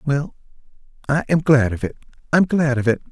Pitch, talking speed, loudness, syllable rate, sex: 140 Hz, 175 wpm, -19 LUFS, 5.6 syllables/s, male